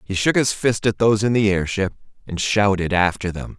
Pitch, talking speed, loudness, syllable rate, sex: 100 Hz, 220 wpm, -19 LUFS, 5.4 syllables/s, male